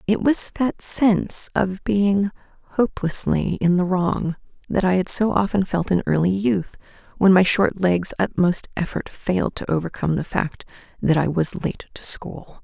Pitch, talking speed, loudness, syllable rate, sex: 185 Hz, 170 wpm, -21 LUFS, 4.6 syllables/s, female